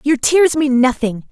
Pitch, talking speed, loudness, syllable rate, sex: 270 Hz, 185 wpm, -14 LUFS, 4.2 syllables/s, female